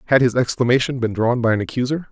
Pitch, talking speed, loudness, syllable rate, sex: 120 Hz, 225 wpm, -19 LUFS, 7.0 syllables/s, male